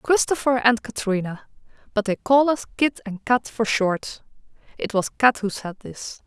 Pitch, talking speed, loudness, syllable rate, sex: 230 Hz, 170 wpm, -22 LUFS, 4.4 syllables/s, female